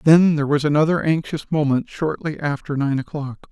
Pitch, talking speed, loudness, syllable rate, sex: 150 Hz, 170 wpm, -20 LUFS, 5.4 syllables/s, male